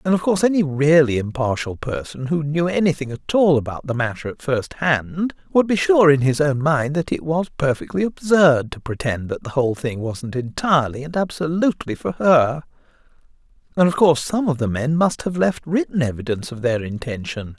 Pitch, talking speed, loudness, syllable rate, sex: 150 Hz, 195 wpm, -20 LUFS, 5.3 syllables/s, male